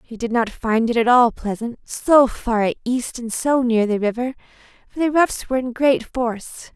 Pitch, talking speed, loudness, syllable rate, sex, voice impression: 240 Hz, 205 wpm, -19 LUFS, 4.7 syllables/s, female, feminine, young, tensed, powerful, bright, clear, slightly cute, friendly, lively, slightly light